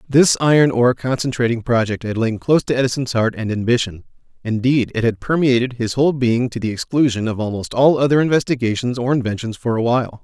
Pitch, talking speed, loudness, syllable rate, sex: 125 Hz, 190 wpm, -18 LUFS, 6.2 syllables/s, male